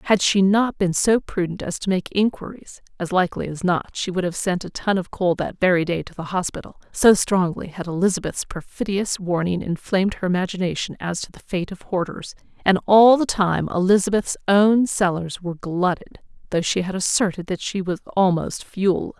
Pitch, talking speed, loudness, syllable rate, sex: 185 Hz, 190 wpm, -21 LUFS, 5.2 syllables/s, female